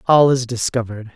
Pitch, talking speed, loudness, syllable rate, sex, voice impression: 120 Hz, 155 wpm, -17 LUFS, 6.0 syllables/s, male, masculine, adult-like, relaxed, slightly bright, soft, slightly muffled, intellectual, calm, friendly, reassuring, slightly wild, kind, modest